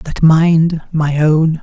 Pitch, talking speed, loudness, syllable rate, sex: 160 Hz, 150 wpm, -13 LUFS, 2.6 syllables/s, female